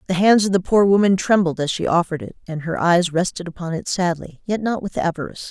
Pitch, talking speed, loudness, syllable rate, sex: 180 Hz, 240 wpm, -19 LUFS, 6.2 syllables/s, female